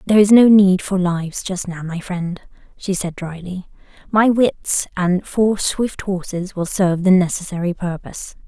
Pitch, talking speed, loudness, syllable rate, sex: 185 Hz, 170 wpm, -18 LUFS, 4.6 syllables/s, female